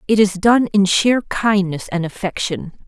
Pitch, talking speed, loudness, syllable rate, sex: 195 Hz, 165 wpm, -17 LUFS, 4.3 syllables/s, female